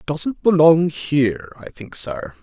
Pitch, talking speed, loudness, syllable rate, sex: 150 Hz, 175 wpm, -18 LUFS, 4.4 syllables/s, male